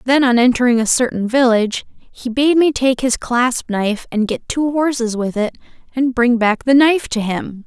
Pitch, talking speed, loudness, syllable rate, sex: 245 Hz, 205 wpm, -16 LUFS, 4.9 syllables/s, female